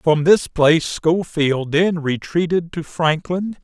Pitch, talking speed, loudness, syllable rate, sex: 165 Hz, 130 wpm, -18 LUFS, 3.7 syllables/s, male